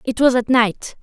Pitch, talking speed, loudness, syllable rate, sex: 240 Hz, 235 wpm, -16 LUFS, 4.5 syllables/s, female